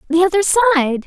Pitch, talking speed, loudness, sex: 345 Hz, 170 wpm, -14 LUFS, female